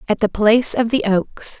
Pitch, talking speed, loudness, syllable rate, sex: 225 Hz, 225 wpm, -17 LUFS, 5.0 syllables/s, female